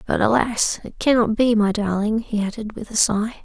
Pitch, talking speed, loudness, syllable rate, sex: 220 Hz, 210 wpm, -20 LUFS, 4.9 syllables/s, female